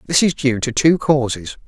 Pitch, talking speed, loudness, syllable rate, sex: 135 Hz, 215 wpm, -17 LUFS, 4.8 syllables/s, male